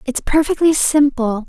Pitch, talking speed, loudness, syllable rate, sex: 280 Hz, 120 wpm, -15 LUFS, 4.4 syllables/s, female